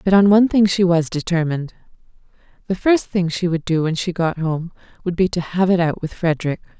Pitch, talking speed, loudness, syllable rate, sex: 175 Hz, 220 wpm, -19 LUFS, 5.9 syllables/s, female